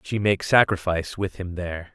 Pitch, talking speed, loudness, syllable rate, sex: 95 Hz, 185 wpm, -23 LUFS, 6.0 syllables/s, male